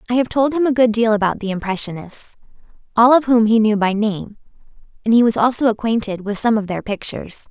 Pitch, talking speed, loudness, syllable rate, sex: 225 Hz, 215 wpm, -17 LUFS, 6.0 syllables/s, female